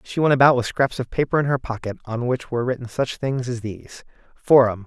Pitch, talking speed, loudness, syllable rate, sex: 125 Hz, 235 wpm, -21 LUFS, 5.9 syllables/s, male